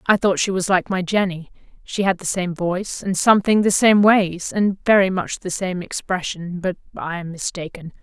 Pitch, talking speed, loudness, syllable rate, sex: 185 Hz, 200 wpm, -19 LUFS, 4.9 syllables/s, female